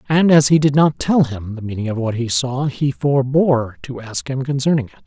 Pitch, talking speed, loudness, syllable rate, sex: 135 Hz, 235 wpm, -17 LUFS, 5.5 syllables/s, male